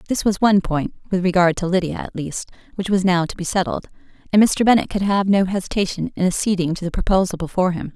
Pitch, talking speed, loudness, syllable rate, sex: 185 Hz, 225 wpm, -19 LUFS, 6.5 syllables/s, female